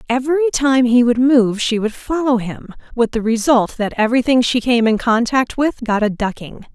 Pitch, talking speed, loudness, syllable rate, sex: 240 Hz, 195 wpm, -16 LUFS, 5.1 syllables/s, female